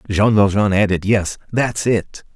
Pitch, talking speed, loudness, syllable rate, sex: 100 Hz, 155 wpm, -17 LUFS, 4.1 syllables/s, male